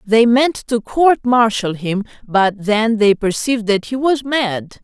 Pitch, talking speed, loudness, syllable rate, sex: 225 Hz, 175 wpm, -16 LUFS, 3.9 syllables/s, female